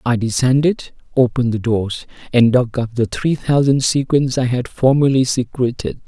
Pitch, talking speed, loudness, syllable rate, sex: 125 Hz, 160 wpm, -17 LUFS, 4.8 syllables/s, male